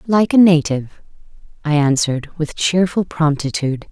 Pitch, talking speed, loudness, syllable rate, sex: 160 Hz, 125 wpm, -16 LUFS, 5.2 syllables/s, female